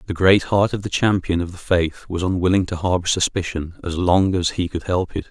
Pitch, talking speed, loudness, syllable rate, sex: 90 Hz, 240 wpm, -20 LUFS, 5.4 syllables/s, male